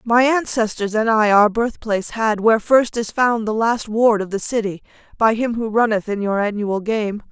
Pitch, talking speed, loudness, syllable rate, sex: 220 Hz, 205 wpm, -18 LUFS, 4.9 syllables/s, female